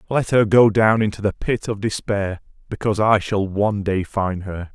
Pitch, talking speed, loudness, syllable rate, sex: 105 Hz, 200 wpm, -19 LUFS, 4.9 syllables/s, male